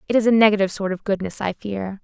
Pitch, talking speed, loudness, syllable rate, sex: 200 Hz, 265 wpm, -20 LUFS, 7.0 syllables/s, female